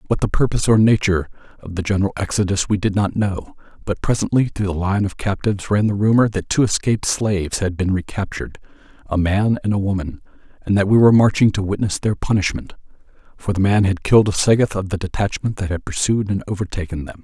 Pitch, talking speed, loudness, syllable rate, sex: 100 Hz, 200 wpm, -19 LUFS, 6.3 syllables/s, male